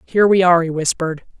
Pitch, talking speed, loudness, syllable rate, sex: 175 Hz, 215 wpm, -16 LUFS, 7.8 syllables/s, female